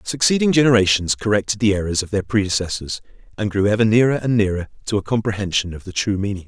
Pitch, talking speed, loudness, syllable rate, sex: 105 Hz, 195 wpm, -19 LUFS, 6.7 syllables/s, male